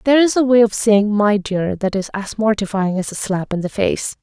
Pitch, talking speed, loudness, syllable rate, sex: 210 Hz, 255 wpm, -17 LUFS, 5.2 syllables/s, female